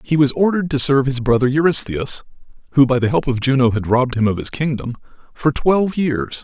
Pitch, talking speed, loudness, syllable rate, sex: 135 Hz, 195 wpm, -17 LUFS, 6.1 syllables/s, male